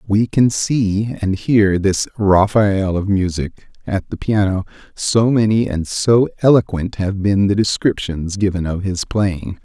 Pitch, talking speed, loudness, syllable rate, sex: 100 Hz, 155 wpm, -17 LUFS, 3.9 syllables/s, male